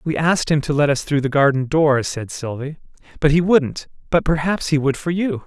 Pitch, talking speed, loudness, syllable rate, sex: 150 Hz, 230 wpm, -19 LUFS, 5.3 syllables/s, male